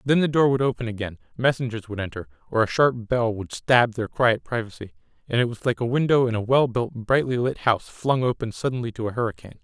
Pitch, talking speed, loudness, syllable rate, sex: 120 Hz, 230 wpm, -23 LUFS, 6.0 syllables/s, male